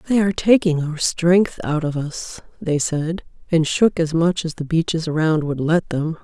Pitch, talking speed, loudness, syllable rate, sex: 165 Hz, 200 wpm, -19 LUFS, 4.5 syllables/s, female